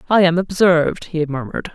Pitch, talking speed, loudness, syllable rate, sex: 170 Hz, 170 wpm, -17 LUFS, 5.8 syllables/s, female